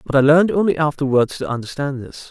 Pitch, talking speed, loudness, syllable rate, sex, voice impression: 145 Hz, 210 wpm, -18 LUFS, 6.4 syllables/s, male, masculine, adult-like, tensed, bright, soft, raspy, cool, calm, reassuring, slightly wild, lively, kind